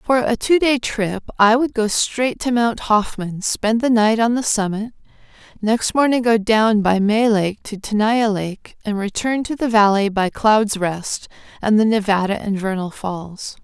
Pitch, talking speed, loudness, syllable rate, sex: 215 Hz, 185 wpm, -18 LUFS, 4.1 syllables/s, female